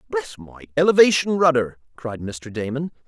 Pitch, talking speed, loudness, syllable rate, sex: 135 Hz, 135 wpm, -20 LUFS, 5.0 syllables/s, male